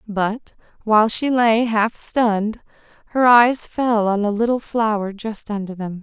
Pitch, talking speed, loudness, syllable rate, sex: 220 Hz, 160 wpm, -18 LUFS, 4.1 syllables/s, female